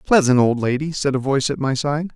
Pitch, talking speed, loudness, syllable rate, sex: 140 Hz, 250 wpm, -19 LUFS, 5.9 syllables/s, male